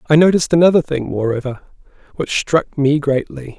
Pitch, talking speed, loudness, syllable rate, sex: 145 Hz, 150 wpm, -16 LUFS, 5.6 syllables/s, male